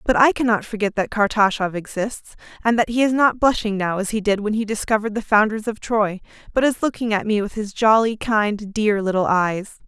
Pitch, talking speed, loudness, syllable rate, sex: 215 Hz, 220 wpm, -20 LUFS, 5.5 syllables/s, female